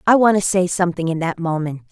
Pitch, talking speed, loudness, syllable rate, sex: 180 Hz, 250 wpm, -18 LUFS, 6.5 syllables/s, female